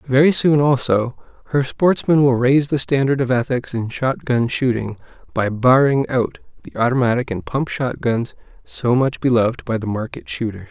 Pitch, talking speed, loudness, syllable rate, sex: 125 Hz, 165 wpm, -18 LUFS, 4.9 syllables/s, male